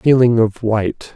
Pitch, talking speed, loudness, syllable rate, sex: 115 Hz, 155 wpm, -16 LUFS, 4.5 syllables/s, male